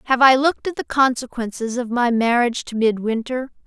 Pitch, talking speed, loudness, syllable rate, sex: 245 Hz, 180 wpm, -19 LUFS, 5.6 syllables/s, female